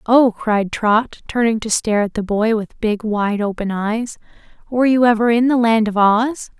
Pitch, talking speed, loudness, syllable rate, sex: 220 Hz, 200 wpm, -17 LUFS, 4.7 syllables/s, female